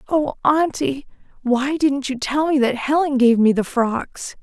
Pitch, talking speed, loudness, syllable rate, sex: 270 Hz, 175 wpm, -19 LUFS, 4.0 syllables/s, female